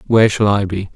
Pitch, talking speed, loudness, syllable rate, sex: 105 Hz, 255 wpm, -15 LUFS, 6.5 syllables/s, male